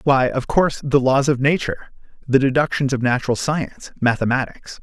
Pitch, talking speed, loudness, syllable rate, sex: 130 Hz, 160 wpm, -19 LUFS, 5.5 syllables/s, male